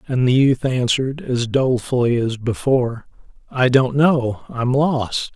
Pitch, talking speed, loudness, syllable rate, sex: 130 Hz, 145 wpm, -18 LUFS, 4.3 syllables/s, male